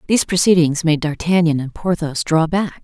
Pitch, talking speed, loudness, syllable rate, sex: 165 Hz, 170 wpm, -17 LUFS, 5.3 syllables/s, female